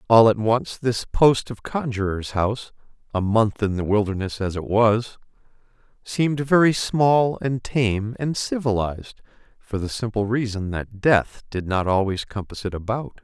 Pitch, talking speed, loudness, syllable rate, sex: 110 Hz, 160 wpm, -22 LUFS, 4.5 syllables/s, male